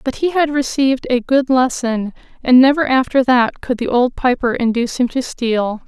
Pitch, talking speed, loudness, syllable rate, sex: 255 Hz, 195 wpm, -16 LUFS, 5.0 syllables/s, female